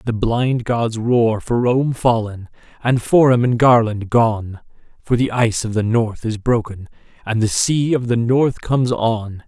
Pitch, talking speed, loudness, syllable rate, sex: 115 Hz, 175 wpm, -17 LUFS, 4.1 syllables/s, male